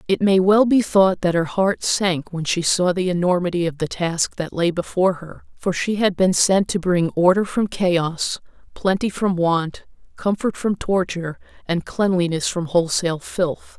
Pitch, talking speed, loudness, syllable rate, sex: 180 Hz, 185 wpm, -20 LUFS, 4.5 syllables/s, female